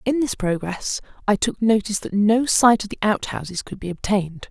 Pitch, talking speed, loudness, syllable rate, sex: 205 Hz, 215 wpm, -21 LUFS, 5.4 syllables/s, female